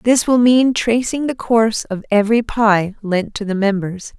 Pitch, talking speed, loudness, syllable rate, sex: 220 Hz, 185 wpm, -16 LUFS, 4.5 syllables/s, female